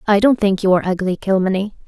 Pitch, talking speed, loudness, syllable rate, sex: 195 Hz, 225 wpm, -17 LUFS, 6.8 syllables/s, female